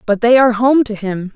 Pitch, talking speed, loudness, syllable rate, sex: 225 Hz, 265 wpm, -13 LUFS, 5.7 syllables/s, female